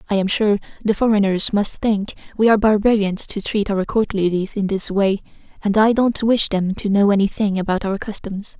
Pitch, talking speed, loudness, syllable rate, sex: 205 Hz, 205 wpm, -19 LUFS, 5.2 syllables/s, female